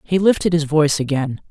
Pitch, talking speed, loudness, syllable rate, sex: 155 Hz, 200 wpm, -17 LUFS, 5.9 syllables/s, male